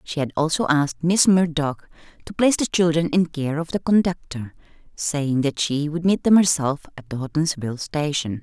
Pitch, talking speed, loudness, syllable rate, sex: 155 Hz, 185 wpm, -21 LUFS, 5.2 syllables/s, female